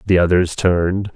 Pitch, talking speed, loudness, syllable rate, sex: 90 Hz, 155 wpm, -16 LUFS, 4.8 syllables/s, male